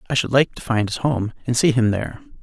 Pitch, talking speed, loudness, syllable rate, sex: 120 Hz, 270 wpm, -20 LUFS, 6.3 syllables/s, male